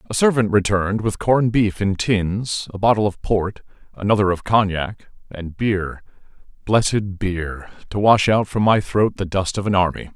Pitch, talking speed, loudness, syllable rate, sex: 100 Hz, 175 wpm, -19 LUFS, 4.6 syllables/s, male